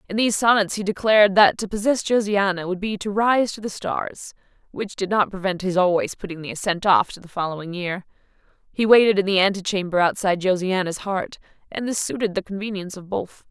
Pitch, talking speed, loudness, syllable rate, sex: 195 Hz, 200 wpm, -21 LUFS, 5.8 syllables/s, female